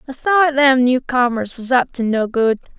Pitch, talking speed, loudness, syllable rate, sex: 255 Hz, 195 wpm, -16 LUFS, 4.5 syllables/s, female